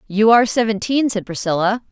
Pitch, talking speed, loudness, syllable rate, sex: 215 Hz, 155 wpm, -17 LUFS, 5.9 syllables/s, female